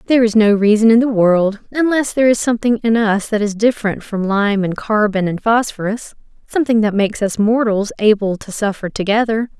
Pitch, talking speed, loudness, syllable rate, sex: 215 Hz, 195 wpm, -15 LUFS, 5.6 syllables/s, female